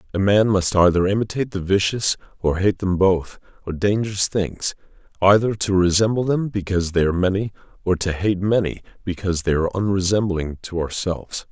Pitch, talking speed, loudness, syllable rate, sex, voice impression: 95 Hz, 165 wpm, -20 LUFS, 5.8 syllables/s, male, very masculine, very adult-like, thick, cool, intellectual, calm, slightly sweet